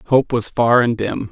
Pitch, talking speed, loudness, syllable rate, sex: 115 Hz, 230 wpm, -16 LUFS, 3.9 syllables/s, male